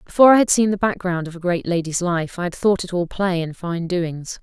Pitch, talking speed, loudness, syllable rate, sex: 180 Hz, 270 wpm, -20 LUFS, 5.5 syllables/s, female